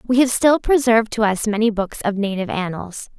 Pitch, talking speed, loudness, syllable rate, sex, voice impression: 220 Hz, 205 wpm, -18 LUFS, 5.7 syllables/s, female, feminine, slightly young, tensed, powerful, bright, soft, clear, slightly intellectual, friendly, elegant, lively, kind